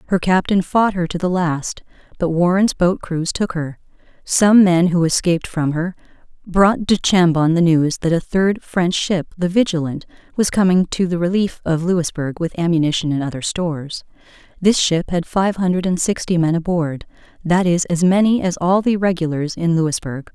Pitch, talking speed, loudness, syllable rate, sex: 175 Hz, 185 wpm, -17 LUFS, 4.8 syllables/s, female